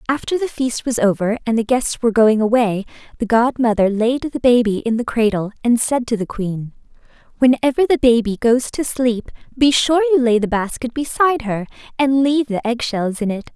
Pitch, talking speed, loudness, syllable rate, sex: 240 Hz, 195 wpm, -17 LUFS, 5.2 syllables/s, female